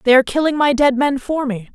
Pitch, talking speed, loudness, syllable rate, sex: 265 Hz, 275 wpm, -16 LUFS, 6.3 syllables/s, female